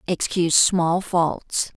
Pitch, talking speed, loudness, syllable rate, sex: 170 Hz, 100 wpm, -20 LUFS, 3.2 syllables/s, female